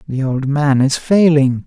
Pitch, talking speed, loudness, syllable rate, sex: 140 Hz, 180 wpm, -14 LUFS, 4.0 syllables/s, male